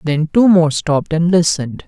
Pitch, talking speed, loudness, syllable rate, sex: 165 Hz, 190 wpm, -14 LUFS, 5.1 syllables/s, male